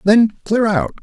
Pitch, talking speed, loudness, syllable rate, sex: 205 Hz, 175 wpm, -16 LUFS, 4.1 syllables/s, male